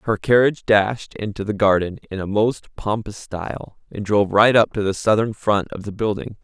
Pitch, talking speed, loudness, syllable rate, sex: 105 Hz, 205 wpm, -20 LUFS, 5.2 syllables/s, male